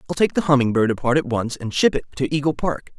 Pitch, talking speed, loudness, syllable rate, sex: 130 Hz, 280 wpm, -20 LUFS, 6.4 syllables/s, male